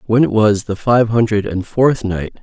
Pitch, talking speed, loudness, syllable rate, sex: 105 Hz, 220 wpm, -15 LUFS, 4.6 syllables/s, male